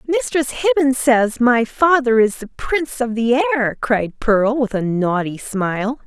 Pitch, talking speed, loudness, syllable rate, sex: 240 Hz, 170 wpm, -17 LUFS, 4.1 syllables/s, female